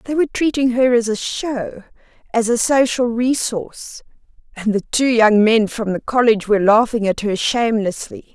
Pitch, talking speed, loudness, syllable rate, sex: 225 Hz, 170 wpm, -17 LUFS, 5.0 syllables/s, female